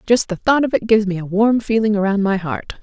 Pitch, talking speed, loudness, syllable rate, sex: 210 Hz, 275 wpm, -17 LUFS, 6.0 syllables/s, female